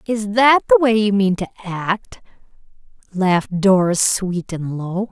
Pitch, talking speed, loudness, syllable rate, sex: 195 Hz, 150 wpm, -17 LUFS, 4.0 syllables/s, female